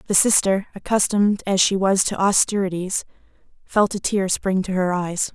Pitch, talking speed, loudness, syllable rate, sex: 195 Hz, 170 wpm, -20 LUFS, 4.9 syllables/s, female